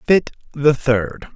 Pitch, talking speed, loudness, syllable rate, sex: 135 Hz, 135 wpm, -18 LUFS, 3.1 syllables/s, male